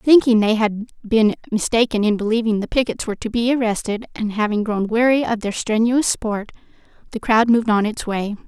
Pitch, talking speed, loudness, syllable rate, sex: 225 Hz, 190 wpm, -19 LUFS, 5.5 syllables/s, female